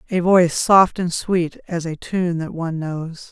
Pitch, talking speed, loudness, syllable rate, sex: 170 Hz, 200 wpm, -19 LUFS, 4.3 syllables/s, female